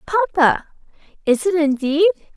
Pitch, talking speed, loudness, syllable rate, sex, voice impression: 335 Hz, 100 wpm, -18 LUFS, 7.0 syllables/s, female, feminine, slightly young, powerful, bright, slightly soft, slightly muffled, slightly cute, friendly, lively, kind